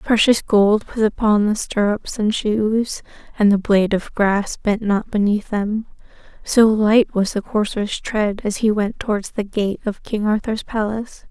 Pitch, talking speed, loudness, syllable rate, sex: 210 Hz, 175 wpm, -19 LUFS, 4.3 syllables/s, female